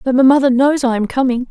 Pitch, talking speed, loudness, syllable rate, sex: 260 Hz, 280 wpm, -14 LUFS, 6.4 syllables/s, female